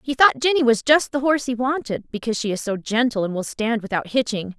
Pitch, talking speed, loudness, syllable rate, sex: 240 Hz, 250 wpm, -21 LUFS, 6.2 syllables/s, female